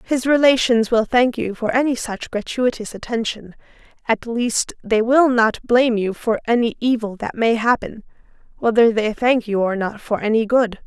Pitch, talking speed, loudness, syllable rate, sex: 230 Hz, 175 wpm, -18 LUFS, 4.7 syllables/s, female